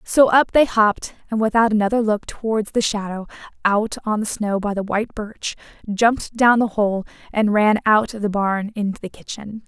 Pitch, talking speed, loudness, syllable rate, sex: 215 Hz, 200 wpm, -19 LUFS, 5.0 syllables/s, female